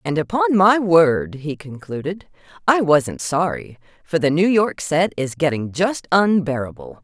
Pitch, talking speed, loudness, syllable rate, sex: 170 Hz, 155 wpm, -19 LUFS, 4.2 syllables/s, female